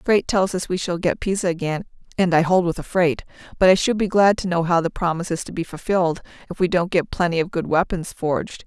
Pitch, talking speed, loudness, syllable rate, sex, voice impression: 175 Hz, 265 wpm, -21 LUFS, 6.4 syllables/s, female, feminine, slightly gender-neutral, adult-like, slightly middle-aged, slightly thin, slightly relaxed, slightly weak, dark, hard, slightly muffled, fluent, slightly cool, intellectual, very sincere, very calm, friendly, reassuring, slightly unique, elegant, slightly sweet, very kind, very modest